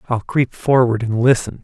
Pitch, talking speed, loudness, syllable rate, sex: 120 Hz, 185 wpm, -17 LUFS, 4.9 syllables/s, male